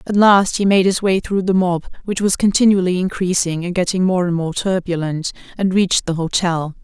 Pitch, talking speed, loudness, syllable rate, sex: 185 Hz, 200 wpm, -17 LUFS, 5.3 syllables/s, female